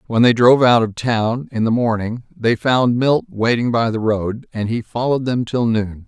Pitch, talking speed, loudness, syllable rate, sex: 115 Hz, 215 wpm, -17 LUFS, 4.7 syllables/s, male